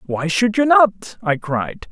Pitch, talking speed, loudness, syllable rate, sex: 195 Hz, 190 wpm, -17 LUFS, 3.5 syllables/s, male